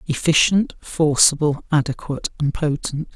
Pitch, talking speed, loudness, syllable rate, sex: 150 Hz, 95 wpm, -19 LUFS, 4.7 syllables/s, male